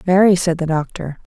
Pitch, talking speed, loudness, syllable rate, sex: 170 Hz, 175 wpm, -17 LUFS, 5.1 syllables/s, female